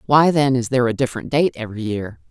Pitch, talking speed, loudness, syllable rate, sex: 125 Hz, 235 wpm, -19 LUFS, 6.7 syllables/s, female